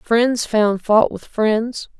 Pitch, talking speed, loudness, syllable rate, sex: 225 Hz, 150 wpm, -18 LUFS, 2.7 syllables/s, female